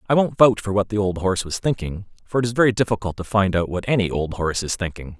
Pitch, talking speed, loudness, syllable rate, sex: 100 Hz, 275 wpm, -21 LUFS, 6.5 syllables/s, male